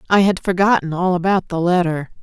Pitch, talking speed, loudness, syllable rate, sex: 180 Hz, 190 wpm, -17 LUFS, 5.7 syllables/s, female